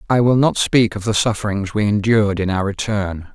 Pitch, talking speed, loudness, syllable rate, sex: 105 Hz, 215 wpm, -18 LUFS, 5.4 syllables/s, male